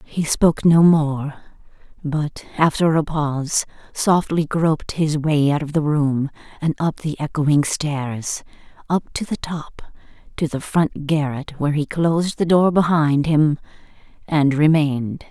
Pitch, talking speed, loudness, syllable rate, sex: 150 Hz, 135 wpm, -19 LUFS, 4.1 syllables/s, female